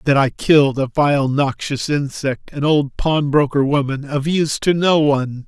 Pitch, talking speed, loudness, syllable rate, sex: 145 Hz, 175 wpm, -17 LUFS, 4.5 syllables/s, male